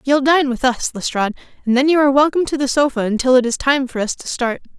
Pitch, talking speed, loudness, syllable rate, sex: 265 Hz, 265 wpm, -17 LUFS, 6.7 syllables/s, female